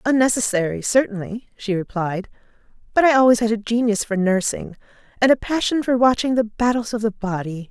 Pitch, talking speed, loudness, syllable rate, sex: 225 Hz, 170 wpm, -20 LUFS, 5.6 syllables/s, female